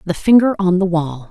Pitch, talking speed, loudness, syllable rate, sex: 180 Hz, 230 wpm, -15 LUFS, 5.2 syllables/s, female